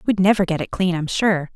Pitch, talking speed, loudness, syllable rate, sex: 180 Hz, 270 wpm, -19 LUFS, 5.6 syllables/s, female